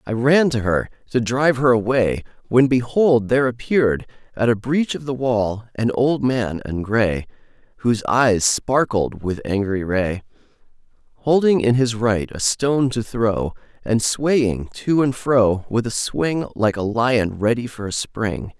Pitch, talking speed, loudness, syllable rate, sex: 115 Hz, 170 wpm, -19 LUFS, 4.1 syllables/s, male